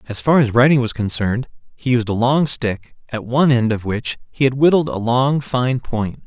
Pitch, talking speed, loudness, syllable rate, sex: 125 Hz, 220 wpm, -18 LUFS, 5.1 syllables/s, male